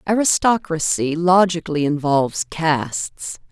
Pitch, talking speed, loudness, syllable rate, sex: 165 Hz, 70 wpm, -19 LUFS, 4.2 syllables/s, female